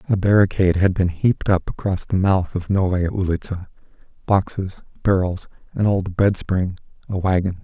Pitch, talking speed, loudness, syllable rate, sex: 95 Hz, 150 wpm, -20 LUFS, 5.1 syllables/s, male